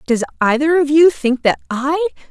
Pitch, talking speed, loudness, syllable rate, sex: 290 Hz, 180 wpm, -15 LUFS, 5.0 syllables/s, female